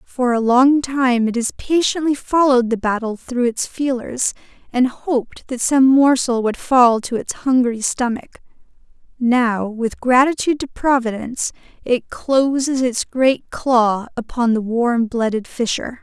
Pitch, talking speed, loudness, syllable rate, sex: 250 Hz, 145 wpm, -18 LUFS, 4.2 syllables/s, female